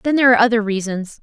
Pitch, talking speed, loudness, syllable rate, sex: 220 Hz, 245 wpm, -16 LUFS, 8.0 syllables/s, female